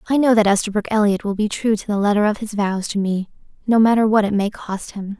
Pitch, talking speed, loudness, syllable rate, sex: 210 Hz, 265 wpm, -19 LUFS, 6.1 syllables/s, female